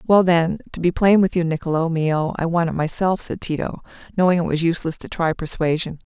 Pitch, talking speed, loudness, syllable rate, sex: 165 Hz, 215 wpm, -20 LUFS, 5.8 syllables/s, female